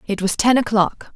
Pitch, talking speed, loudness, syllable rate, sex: 215 Hz, 210 wpm, -18 LUFS, 5.1 syllables/s, female